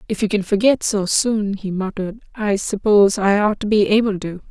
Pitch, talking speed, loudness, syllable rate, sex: 205 Hz, 200 wpm, -18 LUFS, 5.4 syllables/s, female